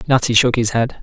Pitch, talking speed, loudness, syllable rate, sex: 120 Hz, 235 wpm, -15 LUFS, 5.8 syllables/s, male